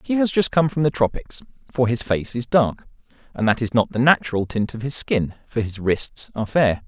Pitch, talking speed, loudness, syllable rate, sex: 125 Hz, 235 wpm, -21 LUFS, 5.3 syllables/s, male